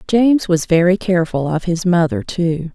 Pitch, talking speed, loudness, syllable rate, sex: 180 Hz, 175 wpm, -16 LUFS, 5.0 syllables/s, female